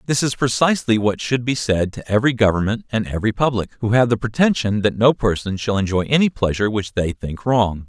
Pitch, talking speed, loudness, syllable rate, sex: 110 Hz, 215 wpm, -19 LUFS, 5.9 syllables/s, male